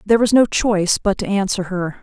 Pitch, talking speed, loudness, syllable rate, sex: 200 Hz, 235 wpm, -17 LUFS, 6.0 syllables/s, female